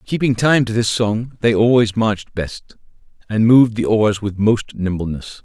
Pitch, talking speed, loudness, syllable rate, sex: 110 Hz, 175 wpm, -17 LUFS, 4.6 syllables/s, male